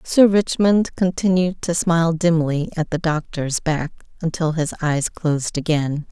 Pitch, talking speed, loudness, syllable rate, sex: 165 Hz, 145 wpm, -20 LUFS, 4.3 syllables/s, female